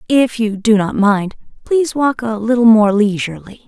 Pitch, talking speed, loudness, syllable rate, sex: 220 Hz, 180 wpm, -14 LUFS, 5.0 syllables/s, female